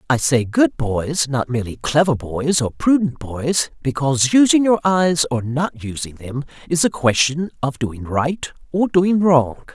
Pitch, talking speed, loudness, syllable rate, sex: 145 Hz, 170 wpm, -18 LUFS, 4.2 syllables/s, male